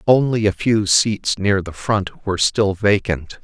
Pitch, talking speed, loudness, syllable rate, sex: 100 Hz, 175 wpm, -18 LUFS, 4.0 syllables/s, male